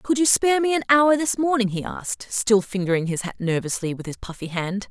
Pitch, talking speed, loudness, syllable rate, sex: 225 Hz, 230 wpm, -22 LUFS, 5.7 syllables/s, female